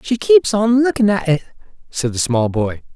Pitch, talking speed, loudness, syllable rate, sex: 180 Hz, 205 wpm, -16 LUFS, 4.6 syllables/s, male